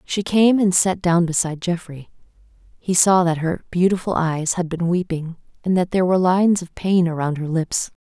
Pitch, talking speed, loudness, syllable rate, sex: 175 Hz, 195 wpm, -19 LUFS, 5.3 syllables/s, female